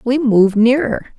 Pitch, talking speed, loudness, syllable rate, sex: 240 Hz, 150 wpm, -14 LUFS, 4.7 syllables/s, female